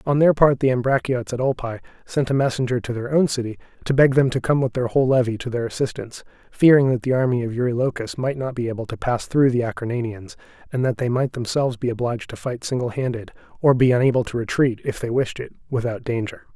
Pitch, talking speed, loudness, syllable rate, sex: 125 Hz, 230 wpm, -21 LUFS, 6.4 syllables/s, male